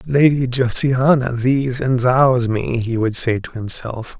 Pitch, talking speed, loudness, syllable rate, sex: 125 Hz, 160 wpm, -17 LUFS, 3.7 syllables/s, male